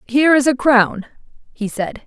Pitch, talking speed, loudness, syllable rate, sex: 250 Hz, 175 wpm, -15 LUFS, 4.8 syllables/s, female